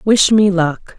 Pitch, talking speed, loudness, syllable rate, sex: 190 Hz, 185 wpm, -13 LUFS, 3.4 syllables/s, female